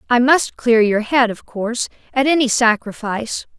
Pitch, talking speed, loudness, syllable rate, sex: 240 Hz, 165 wpm, -17 LUFS, 4.9 syllables/s, female